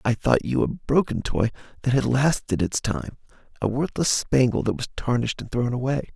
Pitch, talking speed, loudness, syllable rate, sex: 125 Hz, 195 wpm, -24 LUFS, 5.2 syllables/s, male